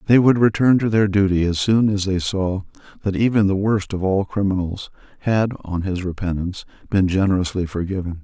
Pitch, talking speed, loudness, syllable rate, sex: 95 Hz, 180 wpm, -20 LUFS, 5.4 syllables/s, male